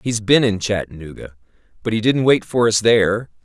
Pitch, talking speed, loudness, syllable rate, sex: 110 Hz, 190 wpm, -17 LUFS, 5.3 syllables/s, male